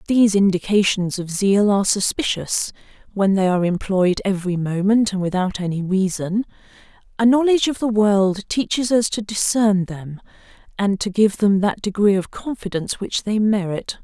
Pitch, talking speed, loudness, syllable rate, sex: 200 Hz, 160 wpm, -19 LUFS, 5.0 syllables/s, female